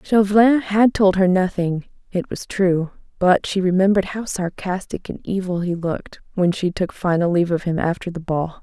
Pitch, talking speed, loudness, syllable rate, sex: 185 Hz, 190 wpm, -20 LUFS, 5.1 syllables/s, female